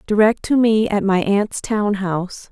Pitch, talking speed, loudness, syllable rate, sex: 205 Hz, 190 wpm, -18 LUFS, 4.2 syllables/s, female